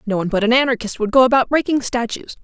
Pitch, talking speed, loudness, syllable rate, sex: 240 Hz, 245 wpm, -17 LUFS, 7.1 syllables/s, female